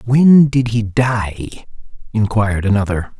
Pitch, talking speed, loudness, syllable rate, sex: 110 Hz, 115 wpm, -15 LUFS, 3.9 syllables/s, male